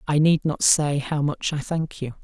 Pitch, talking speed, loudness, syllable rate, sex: 150 Hz, 240 wpm, -22 LUFS, 4.4 syllables/s, male